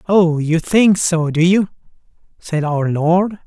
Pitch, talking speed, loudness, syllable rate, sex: 170 Hz, 155 wpm, -16 LUFS, 3.5 syllables/s, male